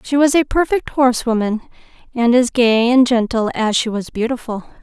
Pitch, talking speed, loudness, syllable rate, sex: 240 Hz, 175 wpm, -16 LUFS, 5.2 syllables/s, female